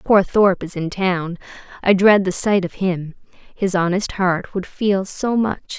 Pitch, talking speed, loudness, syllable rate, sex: 190 Hz, 185 wpm, -19 LUFS, 4.0 syllables/s, female